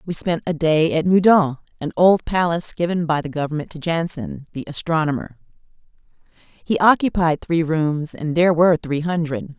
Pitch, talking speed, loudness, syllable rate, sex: 165 Hz, 165 wpm, -19 LUFS, 5.2 syllables/s, female